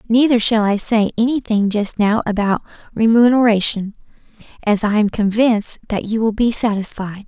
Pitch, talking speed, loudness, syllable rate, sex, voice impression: 215 Hz, 155 wpm, -17 LUFS, 5.1 syllables/s, female, very feminine, slightly young, adult-like, very thin, slightly relaxed, slightly weak, bright, soft, clear, fluent, slightly raspy, very cute, intellectual, very refreshing, sincere, calm, very friendly, very reassuring, unique, very elegant, very sweet, lively, kind, slightly modest, light